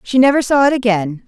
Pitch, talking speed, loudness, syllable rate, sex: 240 Hz, 235 wpm, -14 LUFS, 6.0 syllables/s, female